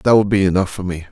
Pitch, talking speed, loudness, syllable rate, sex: 95 Hz, 320 wpm, -17 LUFS, 6.7 syllables/s, male